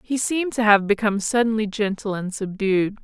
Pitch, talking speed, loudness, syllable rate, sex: 215 Hz, 180 wpm, -21 LUFS, 5.5 syllables/s, female